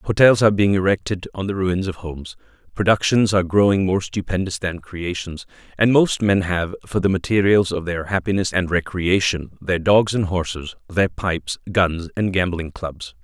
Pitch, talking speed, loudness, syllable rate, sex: 95 Hz, 170 wpm, -20 LUFS, 5.0 syllables/s, male